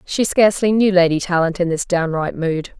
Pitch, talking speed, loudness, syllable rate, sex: 180 Hz, 195 wpm, -17 LUFS, 5.2 syllables/s, female